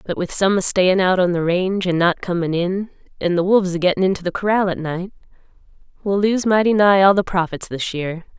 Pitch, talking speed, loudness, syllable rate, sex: 185 Hz, 230 wpm, -18 LUFS, 5.8 syllables/s, female